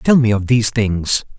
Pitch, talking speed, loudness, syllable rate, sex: 110 Hz, 215 wpm, -16 LUFS, 4.8 syllables/s, male